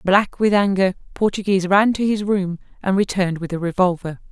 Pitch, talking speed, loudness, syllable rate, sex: 190 Hz, 180 wpm, -19 LUFS, 5.7 syllables/s, female